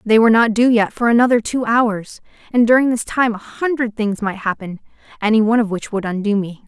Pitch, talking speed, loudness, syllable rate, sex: 225 Hz, 225 wpm, -17 LUFS, 5.8 syllables/s, female